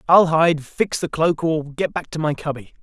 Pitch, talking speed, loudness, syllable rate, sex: 160 Hz, 235 wpm, -20 LUFS, 4.6 syllables/s, male